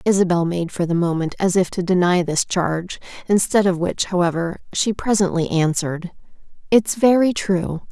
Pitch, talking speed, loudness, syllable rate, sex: 185 Hz, 160 wpm, -19 LUFS, 5.0 syllables/s, female